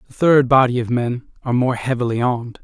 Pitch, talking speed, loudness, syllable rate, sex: 125 Hz, 205 wpm, -18 LUFS, 6.1 syllables/s, male